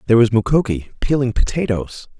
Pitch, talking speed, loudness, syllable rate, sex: 115 Hz, 110 wpm, -18 LUFS, 5.9 syllables/s, male